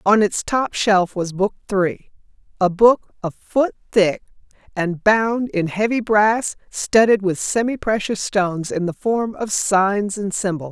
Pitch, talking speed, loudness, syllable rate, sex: 200 Hz, 160 wpm, -19 LUFS, 3.9 syllables/s, female